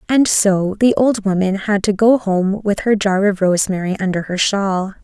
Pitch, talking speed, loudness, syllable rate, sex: 200 Hz, 205 wpm, -16 LUFS, 4.7 syllables/s, female